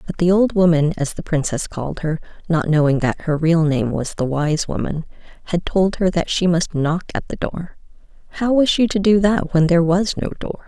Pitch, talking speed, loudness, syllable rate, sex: 170 Hz, 215 wpm, -19 LUFS, 5.2 syllables/s, female